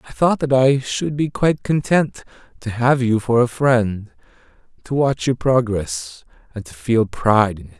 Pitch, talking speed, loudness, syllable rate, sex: 120 Hz, 185 wpm, -18 LUFS, 4.4 syllables/s, male